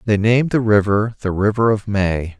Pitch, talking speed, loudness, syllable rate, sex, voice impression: 105 Hz, 200 wpm, -17 LUFS, 5.0 syllables/s, male, masculine, adult-like, sincere, calm, slightly wild